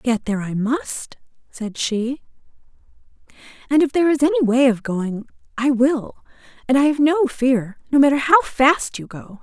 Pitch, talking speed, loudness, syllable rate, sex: 260 Hz, 170 wpm, -19 LUFS, 4.7 syllables/s, female